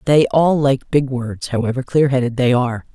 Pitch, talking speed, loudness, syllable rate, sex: 130 Hz, 205 wpm, -17 LUFS, 5.2 syllables/s, female